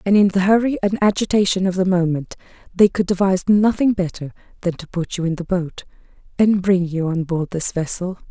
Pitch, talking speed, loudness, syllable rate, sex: 185 Hz, 200 wpm, -19 LUFS, 5.5 syllables/s, female